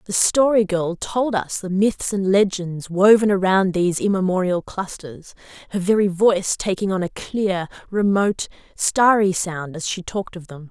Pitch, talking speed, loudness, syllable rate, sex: 190 Hz, 165 wpm, -20 LUFS, 4.7 syllables/s, female